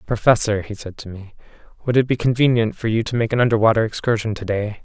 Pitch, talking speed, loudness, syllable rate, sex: 110 Hz, 210 wpm, -19 LUFS, 6.5 syllables/s, male